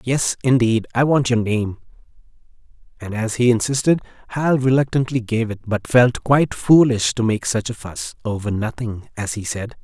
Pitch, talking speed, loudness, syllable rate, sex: 120 Hz, 170 wpm, -19 LUFS, 4.9 syllables/s, male